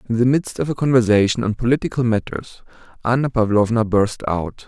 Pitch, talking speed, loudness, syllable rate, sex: 115 Hz, 165 wpm, -19 LUFS, 5.7 syllables/s, male